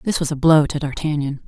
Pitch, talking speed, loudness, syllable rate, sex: 150 Hz, 245 wpm, -19 LUFS, 5.9 syllables/s, female